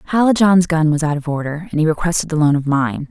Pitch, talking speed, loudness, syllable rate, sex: 160 Hz, 250 wpm, -16 LUFS, 6.4 syllables/s, female